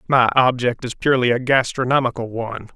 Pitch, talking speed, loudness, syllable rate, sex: 125 Hz, 150 wpm, -19 LUFS, 6.1 syllables/s, male